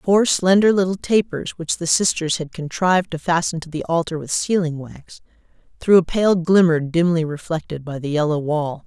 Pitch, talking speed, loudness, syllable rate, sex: 165 Hz, 185 wpm, -19 LUFS, 5.0 syllables/s, female